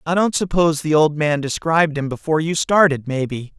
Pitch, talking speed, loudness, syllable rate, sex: 155 Hz, 200 wpm, -18 LUFS, 5.8 syllables/s, male